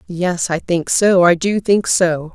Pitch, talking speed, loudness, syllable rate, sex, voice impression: 180 Hz, 205 wpm, -15 LUFS, 3.7 syllables/s, female, feminine, very adult-like, slightly relaxed, slightly intellectual, calm